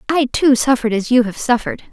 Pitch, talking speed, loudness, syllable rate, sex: 245 Hz, 220 wpm, -16 LUFS, 6.7 syllables/s, female